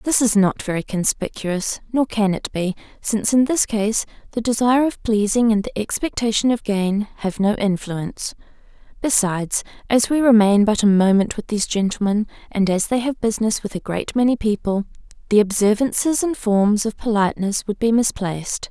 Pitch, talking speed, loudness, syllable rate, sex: 215 Hz, 175 wpm, -19 LUFS, 5.3 syllables/s, female